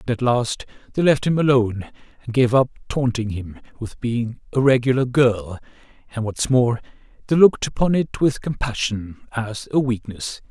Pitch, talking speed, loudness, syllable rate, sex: 120 Hz, 165 wpm, -20 LUFS, 4.9 syllables/s, male